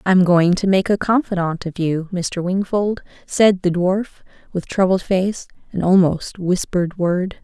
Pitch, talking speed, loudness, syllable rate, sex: 185 Hz, 170 wpm, -18 LUFS, 4.4 syllables/s, female